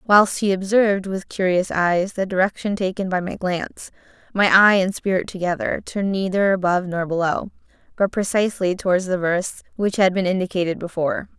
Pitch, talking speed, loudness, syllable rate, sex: 190 Hz, 170 wpm, -20 LUFS, 5.7 syllables/s, female